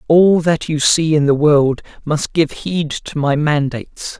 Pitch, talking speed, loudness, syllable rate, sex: 150 Hz, 185 wpm, -16 LUFS, 3.9 syllables/s, male